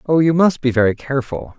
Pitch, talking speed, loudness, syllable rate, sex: 140 Hz, 225 wpm, -16 LUFS, 6.1 syllables/s, male